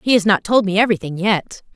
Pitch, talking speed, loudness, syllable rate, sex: 200 Hz, 240 wpm, -17 LUFS, 6.4 syllables/s, female